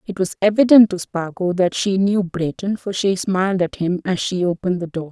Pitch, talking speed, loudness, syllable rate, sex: 185 Hz, 225 wpm, -18 LUFS, 5.3 syllables/s, female